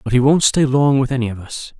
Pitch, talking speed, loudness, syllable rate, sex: 130 Hz, 300 wpm, -16 LUFS, 6.0 syllables/s, male